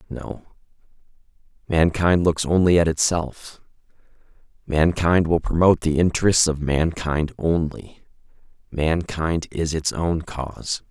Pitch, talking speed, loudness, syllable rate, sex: 80 Hz, 105 wpm, -21 LUFS, 3.9 syllables/s, male